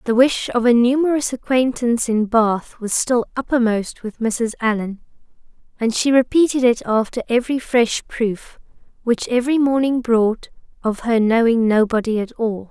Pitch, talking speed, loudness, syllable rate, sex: 235 Hz, 150 wpm, -18 LUFS, 4.7 syllables/s, female